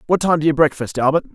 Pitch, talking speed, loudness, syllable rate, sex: 150 Hz, 270 wpm, -17 LUFS, 7.3 syllables/s, male